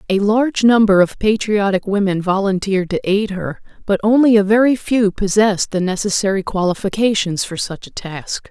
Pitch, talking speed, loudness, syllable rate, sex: 200 Hz, 160 wpm, -16 LUFS, 5.2 syllables/s, female